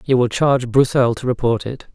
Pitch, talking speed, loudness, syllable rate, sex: 125 Hz, 215 wpm, -17 LUFS, 5.6 syllables/s, male